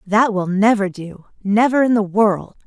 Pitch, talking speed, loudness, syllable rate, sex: 210 Hz, 180 wpm, -17 LUFS, 4.4 syllables/s, female